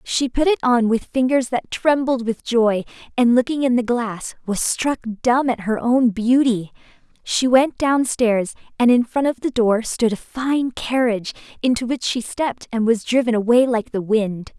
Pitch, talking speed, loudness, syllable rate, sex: 240 Hz, 190 wpm, -19 LUFS, 4.5 syllables/s, female